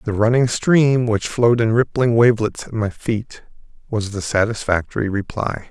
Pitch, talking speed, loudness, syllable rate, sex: 115 Hz, 160 wpm, -18 LUFS, 4.9 syllables/s, male